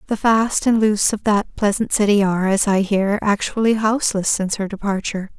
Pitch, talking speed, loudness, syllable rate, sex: 205 Hz, 190 wpm, -18 LUFS, 5.6 syllables/s, female